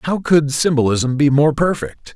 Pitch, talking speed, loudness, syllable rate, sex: 150 Hz, 165 wpm, -16 LUFS, 4.5 syllables/s, male